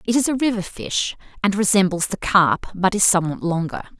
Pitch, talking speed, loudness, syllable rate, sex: 195 Hz, 195 wpm, -20 LUFS, 5.5 syllables/s, female